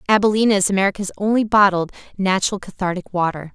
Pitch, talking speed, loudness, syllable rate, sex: 195 Hz, 135 wpm, -18 LUFS, 6.8 syllables/s, female